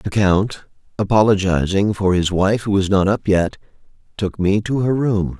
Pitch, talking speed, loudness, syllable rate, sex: 100 Hz, 180 wpm, -18 LUFS, 4.5 syllables/s, male